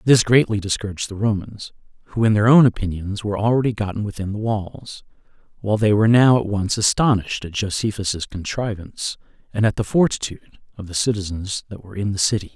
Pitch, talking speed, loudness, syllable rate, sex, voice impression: 105 Hz, 180 wpm, -20 LUFS, 6.2 syllables/s, male, very masculine, very adult-like, very middle-aged, thick, slightly relaxed, slightly weak, slightly dark, soft, clear, fluent, cool, intellectual, slightly refreshing, sincere, calm, mature, friendly, very reassuring, unique, elegant, slightly wild, slightly sweet, kind, slightly modest